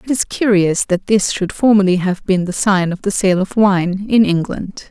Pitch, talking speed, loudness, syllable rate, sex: 195 Hz, 220 wpm, -15 LUFS, 4.7 syllables/s, female